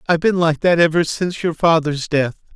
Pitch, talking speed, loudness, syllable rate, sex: 165 Hz, 210 wpm, -17 LUFS, 5.8 syllables/s, male